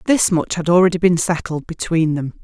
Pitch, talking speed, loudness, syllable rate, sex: 170 Hz, 195 wpm, -17 LUFS, 5.3 syllables/s, female